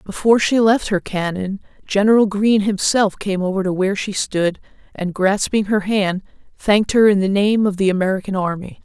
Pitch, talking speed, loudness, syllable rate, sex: 200 Hz, 185 wpm, -17 LUFS, 5.4 syllables/s, female